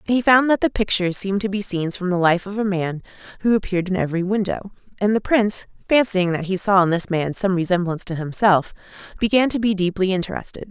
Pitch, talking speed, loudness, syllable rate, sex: 195 Hz, 220 wpm, -20 LUFS, 6.4 syllables/s, female